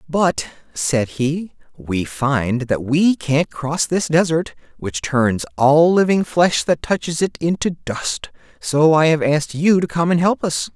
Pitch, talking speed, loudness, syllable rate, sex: 150 Hz, 175 wpm, -18 LUFS, 3.8 syllables/s, male